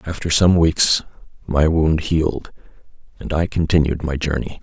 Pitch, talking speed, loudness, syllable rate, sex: 80 Hz, 145 wpm, -18 LUFS, 4.6 syllables/s, male